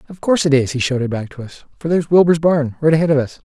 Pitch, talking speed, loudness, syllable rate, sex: 145 Hz, 275 wpm, -16 LUFS, 7.2 syllables/s, male